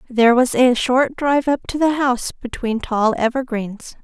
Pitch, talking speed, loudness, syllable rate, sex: 250 Hz, 180 wpm, -18 LUFS, 5.0 syllables/s, female